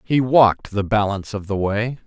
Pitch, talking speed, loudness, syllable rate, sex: 105 Hz, 205 wpm, -19 LUFS, 5.2 syllables/s, male